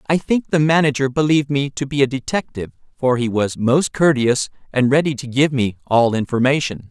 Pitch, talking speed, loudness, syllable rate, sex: 135 Hz, 190 wpm, -18 LUFS, 5.5 syllables/s, male